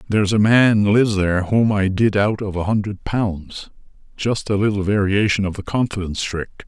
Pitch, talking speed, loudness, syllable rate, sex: 100 Hz, 190 wpm, -19 LUFS, 5.4 syllables/s, male